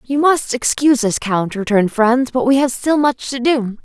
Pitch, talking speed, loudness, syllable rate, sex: 250 Hz, 220 wpm, -16 LUFS, 4.9 syllables/s, female